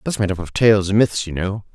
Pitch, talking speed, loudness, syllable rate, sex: 100 Hz, 310 wpm, -18 LUFS, 5.7 syllables/s, male